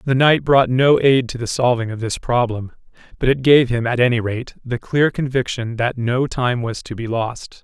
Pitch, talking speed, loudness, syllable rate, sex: 125 Hz, 220 wpm, -18 LUFS, 4.7 syllables/s, male